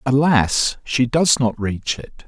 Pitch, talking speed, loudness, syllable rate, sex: 125 Hz, 160 wpm, -18 LUFS, 3.4 syllables/s, male